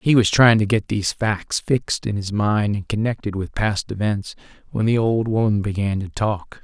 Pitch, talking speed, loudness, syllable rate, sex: 105 Hz, 210 wpm, -20 LUFS, 4.8 syllables/s, male